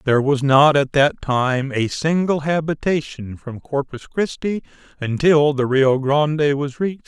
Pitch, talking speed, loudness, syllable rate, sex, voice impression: 145 Hz, 155 wpm, -18 LUFS, 4.4 syllables/s, male, very masculine, very adult-like, middle-aged, very thick, tensed, powerful, slightly bright, soft, slightly muffled, fluent, slightly raspy, cool, very intellectual, slightly refreshing, sincere, very calm, very mature, very friendly, reassuring, unique, very elegant, slightly sweet, lively, very kind